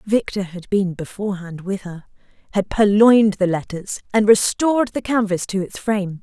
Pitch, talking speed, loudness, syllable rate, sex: 200 Hz, 165 wpm, -19 LUFS, 5.1 syllables/s, female